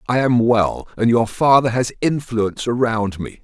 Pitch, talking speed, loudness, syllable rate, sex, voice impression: 115 Hz, 175 wpm, -18 LUFS, 4.6 syllables/s, male, very masculine, middle-aged, thick, tensed, powerful, very bright, soft, very clear, very fluent, slightly raspy, cool, very intellectual, very refreshing, sincere, slightly calm, friendly, reassuring, very unique, slightly elegant, wild, sweet, very lively, kind, slightly intense